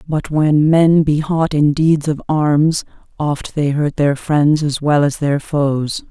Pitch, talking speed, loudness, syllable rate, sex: 150 Hz, 185 wpm, -15 LUFS, 3.4 syllables/s, female